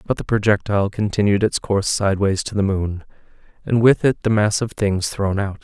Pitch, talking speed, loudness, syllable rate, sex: 105 Hz, 200 wpm, -19 LUFS, 5.5 syllables/s, male